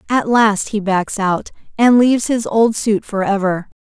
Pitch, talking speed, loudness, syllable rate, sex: 210 Hz, 190 wpm, -16 LUFS, 4.3 syllables/s, female